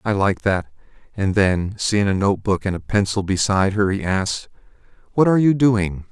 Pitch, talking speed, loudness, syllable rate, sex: 100 Hz, 185 wpm, -19 LUFS, 4.9 syllables/s, male